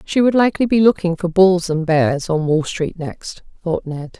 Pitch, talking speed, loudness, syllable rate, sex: 175 Hz, 215 wpm, -17 LUFS, 4.6 syllables/s, female